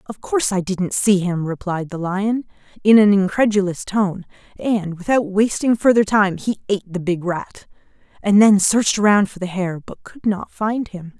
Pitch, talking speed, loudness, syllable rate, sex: 195 Hz, 190 wpm, -18 LUFS, 4.8 syllables/s, female